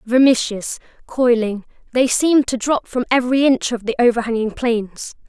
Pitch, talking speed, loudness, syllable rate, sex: 240 Hz, 150 wpm, -17 LUFS, 5.3 syllables/s, female